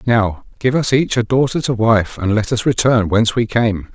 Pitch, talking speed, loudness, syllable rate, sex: 115 Hz, 230 wpm, -16 LUFS, 4.9 syllables/s, male